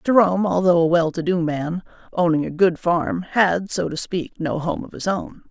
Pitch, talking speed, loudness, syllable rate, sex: 175 Hz, 220 wpm, -21 LUFS, 4.8 syllables/s, female